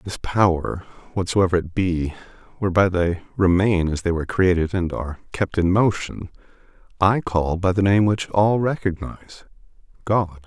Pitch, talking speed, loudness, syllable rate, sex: 95 Hz, 145 wpm, -21 LUFS, 4.6 syllables/s, male